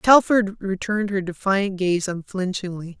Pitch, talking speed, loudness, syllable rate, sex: 195 Hz, 120 wpm, -22 LUFS, 4.4 syllables/s, female